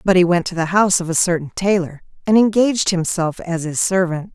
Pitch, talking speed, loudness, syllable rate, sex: 180 Hz, 220 wpm, -17 LUFS, 5.8 syllables/s, female